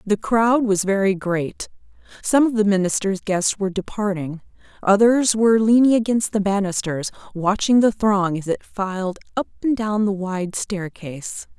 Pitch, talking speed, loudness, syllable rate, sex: 200 Hz, 155 wpm, -20 LUFS, 4.6 syllables/s, female